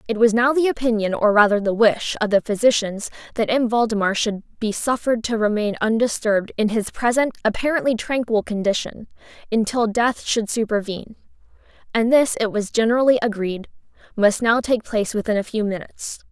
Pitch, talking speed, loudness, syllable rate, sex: 220 Hz, 160 wpm, -20 LUFS, 5.5 syllables/s, female